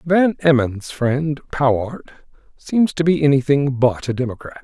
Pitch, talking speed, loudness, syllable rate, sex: 140 Hz, 145 wpm, -18 LUFS, 4.4 syllables/s, male